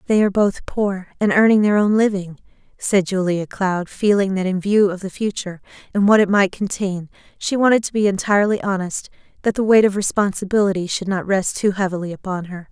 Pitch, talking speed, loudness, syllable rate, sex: 195 Hz, 200 wpm, -19 LUFS, 5.7 syllables/s, female